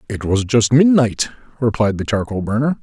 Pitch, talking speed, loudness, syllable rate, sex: 115 Hz, 170 wpm, -17 LUFS, 5.2 syllables/s, male